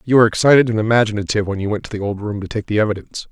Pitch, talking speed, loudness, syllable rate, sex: 105 Hz, 290 wpm, -17 LUFS, 8.5 syllables/s, male